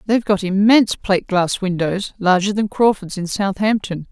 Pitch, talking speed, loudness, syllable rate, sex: 195 Hz, 160 wpm, -17 LUFS, 5.1 syllables/s, female